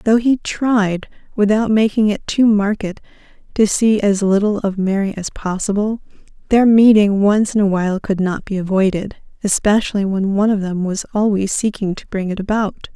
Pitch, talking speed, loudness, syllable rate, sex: 205 Hz, 175 wpm, -16 LUFS, 5.1 syllables/s, female